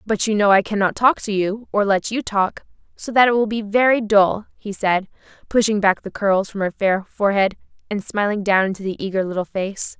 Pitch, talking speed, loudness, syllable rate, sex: 205 Hz, 220 wpm, -19 LUFS, 5.3 syllables/s, female